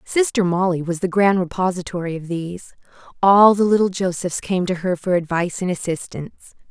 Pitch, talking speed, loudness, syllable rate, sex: 180 Hz, 170 wpm, -19 LUFS, 5.8 syllables/s, female